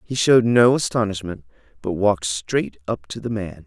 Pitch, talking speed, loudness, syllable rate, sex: 105 Hz, 180 wpm, -20 LUFS, 5.2 syllables/s, male